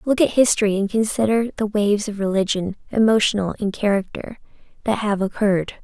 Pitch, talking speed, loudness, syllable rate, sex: 210 Hz, 155 wpm, -20 LUFS, 5.9 syllables/s, female